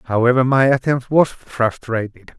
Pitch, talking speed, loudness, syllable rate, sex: 125 Hz, 125 wpm, -17 LUFS, 4.3 syllables/s, male